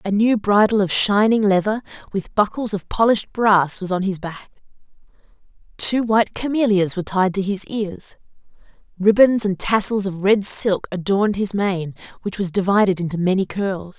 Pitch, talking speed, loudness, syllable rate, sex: 200 Hz, 165 wpm, -19 LUFS, 5.0 syllables/s, female